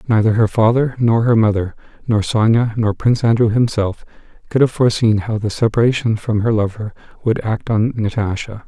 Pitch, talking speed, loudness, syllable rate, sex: 110 Hz, 175 wpm, -16 LUFS, 5.4 syllables/s, male